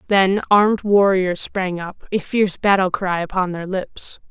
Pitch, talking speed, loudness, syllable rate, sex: 190 Hz, 165 wpm, -18 LUFS, 4.4 syllables/s, female